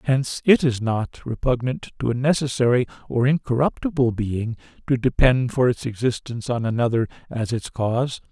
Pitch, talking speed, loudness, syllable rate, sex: 125 Hz, 150 wpm, -22 LUFS, 5.3 syllables/s, male